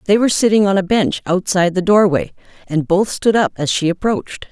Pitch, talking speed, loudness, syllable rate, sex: 190 Hz, 215 wpm, -16 LUFS, 5.8 syllables/s, female